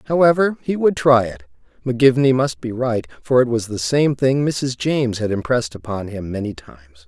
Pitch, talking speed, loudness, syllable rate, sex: 120 Hz, 195 wpm, -19 LUFS, 5.6 syllables/s, male